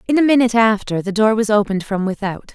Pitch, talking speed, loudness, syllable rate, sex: 215 Hz, 235 wpm, -17 LUFS, 6.6 syllables/s, female